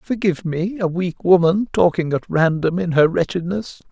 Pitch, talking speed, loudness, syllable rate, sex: 175 Hz, 170 wpm, -19 LUFS, 4.9 syllables/s, male